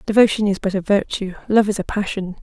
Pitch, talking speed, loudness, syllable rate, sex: 200 Hz, 225 wpm, -19 LUFS, 6.1 syllables/s, female